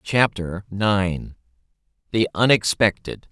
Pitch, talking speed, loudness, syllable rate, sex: 100 Hz, 55 wpm, -21 LUFS, 3.4 syllables/s, male